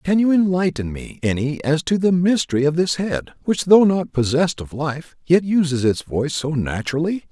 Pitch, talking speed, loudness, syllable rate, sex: 160 Hz, 195 wpm, -19 LUFS, 5.2 syllables/s, male